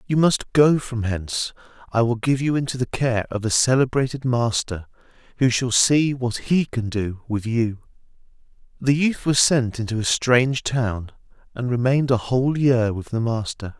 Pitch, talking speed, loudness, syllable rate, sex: 120 Hz, 180 wpm, -21 LUFS, 4.7 syllables/s, male